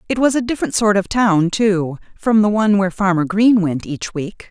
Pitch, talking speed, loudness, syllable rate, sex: 200 Hz, 225 wpm, -17 LUFS, 5.3 syllables/s, female